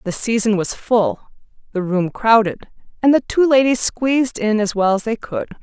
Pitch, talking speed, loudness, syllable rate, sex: 220 Hz, 190 wpm, -17 LUFS, 4.8 syllables/s, female